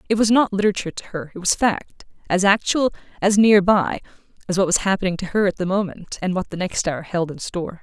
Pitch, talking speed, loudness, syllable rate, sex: 190 Hz, 240 wpm, -20 LUFS, 6.1 syllables/s, female